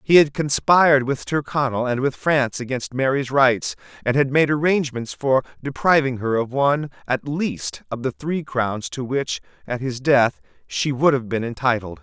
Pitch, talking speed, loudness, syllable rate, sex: 130 Hz, 180 wpm, -21 LUFS, 4.8 syllables/s, male